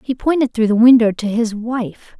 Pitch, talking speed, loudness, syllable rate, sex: 235 Hz, 220 wpm, -15 LUFS, 4.8 syllables/s, female